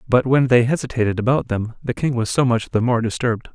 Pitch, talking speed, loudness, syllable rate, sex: 120 Hz, 235 wpm, -19 LUFS, 6.1 syllables/s, male